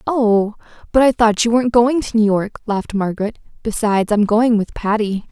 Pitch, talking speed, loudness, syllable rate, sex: 220 Hz, 180 wpm, -17 LUFS, 5.3 syllables/s, female